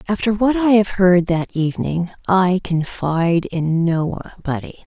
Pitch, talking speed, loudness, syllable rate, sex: 185 Hz, 135 wpm, -18 LUFS, 4.5 syllables/s, female